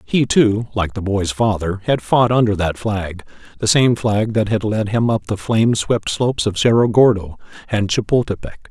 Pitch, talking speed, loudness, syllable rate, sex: 110 Hz, 195 wpm, -17 LUFS, 4.8 syllables/s, male